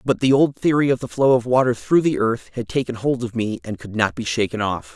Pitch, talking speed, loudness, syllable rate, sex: 120 Hz, 280 wpm, -20 LUFS, 5.7 syllables/s, male